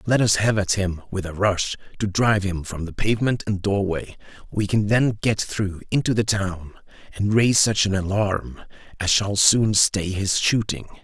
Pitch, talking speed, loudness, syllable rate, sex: 100 Hz, 190 wpm, -21 LUFS, 4.7 syllables/s, male